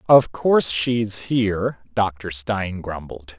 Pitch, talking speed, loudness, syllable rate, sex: 100 Hz, 125 wpm, -21 LUFS, 3.6 syllables/s, male